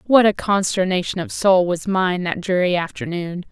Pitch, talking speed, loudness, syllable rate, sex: 185 Hz, 170 wpm, -19 LUFS, 4.7 syllables/s, female